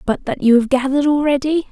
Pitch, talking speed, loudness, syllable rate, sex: 275 Hz, 210 wpm, -16 LUFS, 6.5 syllables/s, female